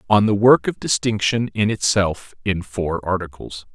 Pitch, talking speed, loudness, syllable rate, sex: 100 Hz, 160 wpm, -19 LUFS, 3.9 syllables/s, male